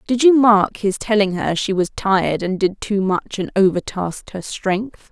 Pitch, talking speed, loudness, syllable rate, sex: 200 Hz, 200 wpm, -18 LUFS, 4.5 syllables/s, female